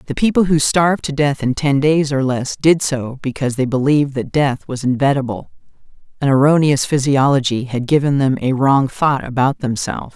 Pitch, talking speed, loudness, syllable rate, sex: 140 Hz, 185 wpm, -16 LUFS, 5.5 syllables/s, female